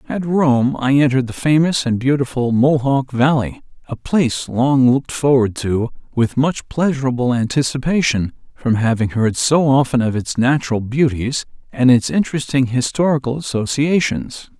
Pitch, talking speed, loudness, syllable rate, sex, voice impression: 130 Hz, 140 wpm, -17 LUFS, 4.8 syllables/s, male, very masculine, very middle-aged, thick, tensed, slightly powerful, bright, soft, clear, fluent, very cool, intellectual, refreshing, sincere, calm, friendly, very reassuring, unique, elegant, wild, slightly sweet, very lively, kind, intense